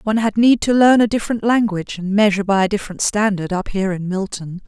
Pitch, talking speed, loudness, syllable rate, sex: 205 Hz, 230 wpm, -17 LUFS, 6.6 syllables/s, female